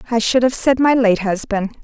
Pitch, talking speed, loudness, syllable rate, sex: 230 Hz, 230 wpm, -16 LUFS, 5.1 syllables/s, female